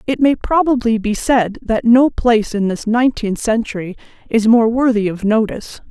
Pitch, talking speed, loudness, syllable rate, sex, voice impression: 230 Hz, 175 wpm, -15 LUFS, 5.1 syllables/s, female, very feminine, very adult-like, middle-aged, slightly tensed, slightly weak, bright, hard, very clear, fluent, slightly cool, very intellectual, refreshing, very sincere, very friendly, reassuring, very unique, very elegant, slightly wild, sweet, kind, slightly strict